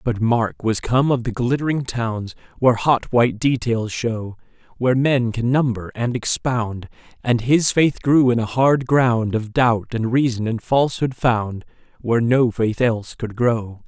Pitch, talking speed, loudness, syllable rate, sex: 120 Hz, 175 wpm, -19 LUFS, 4.3 syllables/s, male